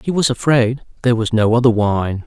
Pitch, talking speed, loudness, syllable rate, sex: 120 Hz, 210 wpm, -16 LUFS, 5.5 syllables/s, male